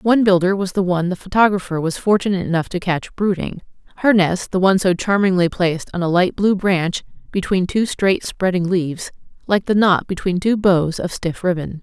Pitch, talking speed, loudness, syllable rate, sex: 185 Hz, 200 wpm, -18 LUFS, 5.5 syllables/s, female